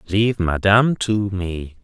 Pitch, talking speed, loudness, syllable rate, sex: 100 Hz, 130 wpm, -19 LUFS, 4.3 syllables/s, male